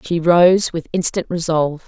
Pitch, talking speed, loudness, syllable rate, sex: 170 Hz, 160 wpm, -16 LUFS, 4.6 syllables/s, female